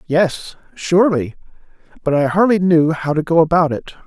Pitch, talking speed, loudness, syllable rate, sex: 165 Hz, 160 wpm, -16 LUFS, 5.2 syllables/s, male